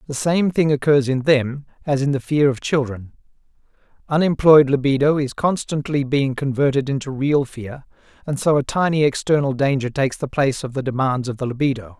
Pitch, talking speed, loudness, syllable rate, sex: 140 Hz, 180 wpm, -19 LUFS, 5.4 syllables/s, male